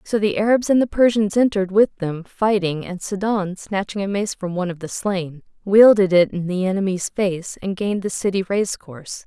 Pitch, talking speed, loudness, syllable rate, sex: 195 Hz, 205 wpm, -20 LUFS, 5.4 syllables/s, female